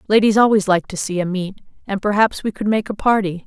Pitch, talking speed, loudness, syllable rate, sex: 200 Hz, 240 wpm, -18 LUFS, 5.9 syllables/s, female